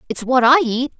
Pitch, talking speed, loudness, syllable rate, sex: 260 Hz, 240 wpm, -15 LUFS, 5.3 syllables/s, female